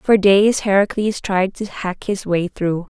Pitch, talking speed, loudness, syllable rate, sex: 195 Hz, 180 wpm, -18 LUFS, 3.9 syllables/s, female